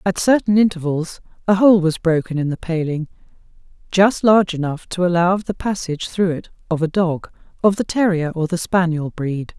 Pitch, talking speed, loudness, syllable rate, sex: 175 Hz, 190 wpm, -18 LUFS, 5.3 syllables/s, female